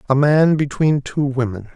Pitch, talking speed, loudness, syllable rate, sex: 135 Hz, 170 wpm, -17 LUFS, 4.6 syllables/s, male